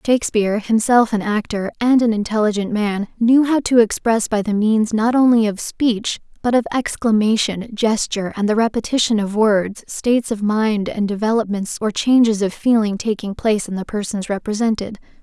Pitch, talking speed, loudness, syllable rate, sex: 220 Hz, 170 wpm, -18 LUFS, 5.1 syllables/s, female